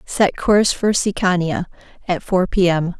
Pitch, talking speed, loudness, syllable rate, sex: 185 Hz, 160 wpm, -18 LUFS, 4.5 syllables/s, female